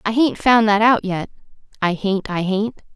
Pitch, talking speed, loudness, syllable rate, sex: 205 Hz, 205 wpm, -18 LUFS, 4.4 syllables/s, female